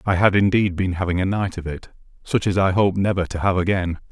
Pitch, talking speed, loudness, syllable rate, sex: 95 Hz, 250 wpm, -20 LUFS, 5.9 syllables/s, male